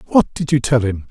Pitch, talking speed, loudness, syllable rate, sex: 135 Hz, 270 wpm, -17 LUFS, 6.1 syllables/s, male